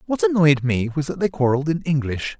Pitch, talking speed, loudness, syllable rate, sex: 150 Hz, 225 wpm, -20 LUFS, 5.8 syllables/s, male